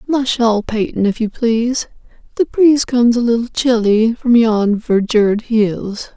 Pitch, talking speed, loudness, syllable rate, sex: 230 Hz, 145 wpm, -15 LUFS, 4.5 syllables/s, female